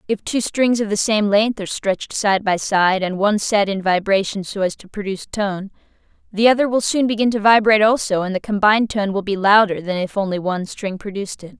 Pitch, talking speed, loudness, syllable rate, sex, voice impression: 205 Hz, 230 wpm, -18 LUFS, 5.9 syllables/s, female, very feminine, young, thin, very tensed, very powerful, very bright, hard, very clear, very fluent, cute, slightly cool, intellectual, slightly refreshing, sincere, slightly calm, friendly, reassuring, very unique, elegant, wild, very sweet, very lively, strict, intense, sharp, very light